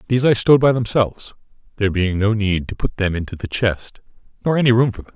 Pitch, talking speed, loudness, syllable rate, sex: 110 Hz, 235 wpm, -18 LUFS, 6.6 syllables/s, male